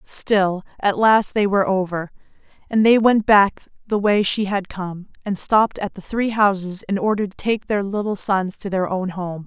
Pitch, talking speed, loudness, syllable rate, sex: 200 Hz, 205 wpm, -19 LUFS, 4.6 syllables/s, female